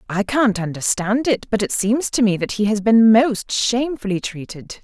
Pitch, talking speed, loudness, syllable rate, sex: 220 Hz, 200 wpm, -18 LUFS, 4.7 syllables/s, female